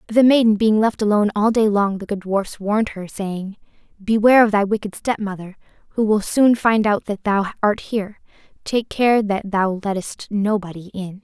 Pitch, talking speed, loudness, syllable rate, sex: 205 Hz, 185 wpm, -19 LUFS, 5.1 syllables/s, female